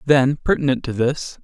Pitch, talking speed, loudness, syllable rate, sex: 135 Hz, 170 wpm, -19 LUFS, 4.8 syllables/s, male